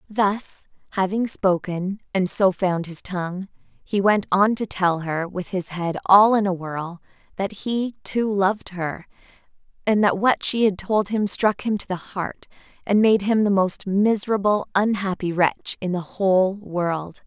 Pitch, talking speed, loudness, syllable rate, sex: 195 Hz, 175 wpm, -22 LUFS, 4.1 syllables/s, female